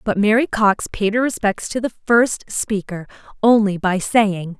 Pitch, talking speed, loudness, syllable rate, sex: 210 Hz, 170 wpm, -18 LUFS, 4.3 syllables/s, female